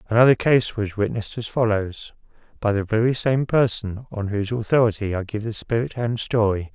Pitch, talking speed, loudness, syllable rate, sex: 110 Hz, 180 wpm, -22 LUFS, 5.4 syllables/s, male